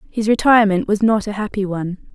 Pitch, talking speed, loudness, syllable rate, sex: 205 Hz, 195 wpm, -17 LUFS, 6.3 syllables/s, female